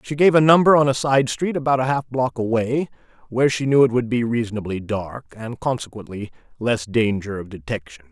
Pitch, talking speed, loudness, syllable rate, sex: 120 Hz, 200 wpm, -20 LUFS, 5.5 syllables/s, male